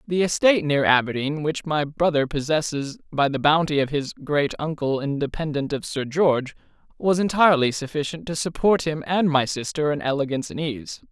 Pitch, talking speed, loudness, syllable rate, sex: 150 Hz, 175 wpm, -22 LUFS, 5.3 syllables/s, male